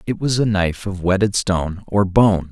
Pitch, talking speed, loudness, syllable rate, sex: 100 Hz, 215 wpm, -18 LUFS, 5.1 syllables/s, male